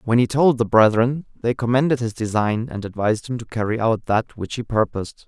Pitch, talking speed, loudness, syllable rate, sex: 115 Hz, 215 wpm, -20 LUFS, 5.6 syllables/s, male